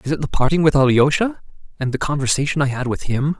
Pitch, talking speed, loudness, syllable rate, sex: 145 Hz, 230 wpm, -19 LUFS, 6.5 syllables/s, male